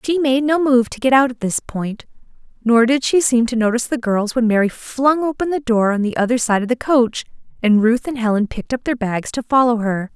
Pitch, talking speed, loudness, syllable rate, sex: 240 Hz, 250 wpm, -17 LUFS, 5.5 syllables/s, female